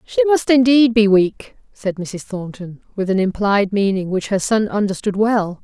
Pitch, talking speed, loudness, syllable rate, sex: 205 Hz, 180 wpm, -17 LUFS, 4.4 syllables/s, female